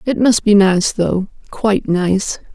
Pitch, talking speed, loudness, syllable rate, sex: 200 Hz, 140 wpm, -15 LUFS, 3.9 syllables/s, female